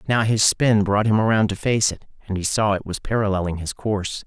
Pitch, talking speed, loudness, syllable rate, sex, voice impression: 105 Hz, 240 wpm, -21 LUFS, 5.6 syllables/s, male, masculine, adult-like, fluent, intellectual